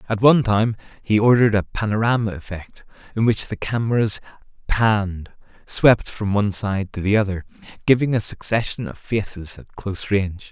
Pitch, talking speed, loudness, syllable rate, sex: 105 Hz, 160 wpm, -20 LUFS, 5.4 syllables/s, male